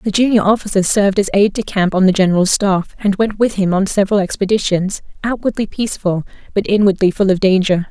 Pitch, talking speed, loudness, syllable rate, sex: 200 Hz, 195 wpm, -15 LUFS, 6.2 syllables/s, female